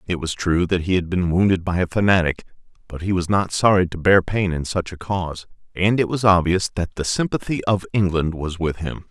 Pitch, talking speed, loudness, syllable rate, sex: 90 Hz, 230 wpm, -20 LUFS, 5.4 syllables/s, male